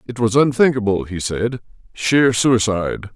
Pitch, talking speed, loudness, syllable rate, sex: 115 Hz, 135 wpm, -17 LUFS, 4.7 syllables/s, male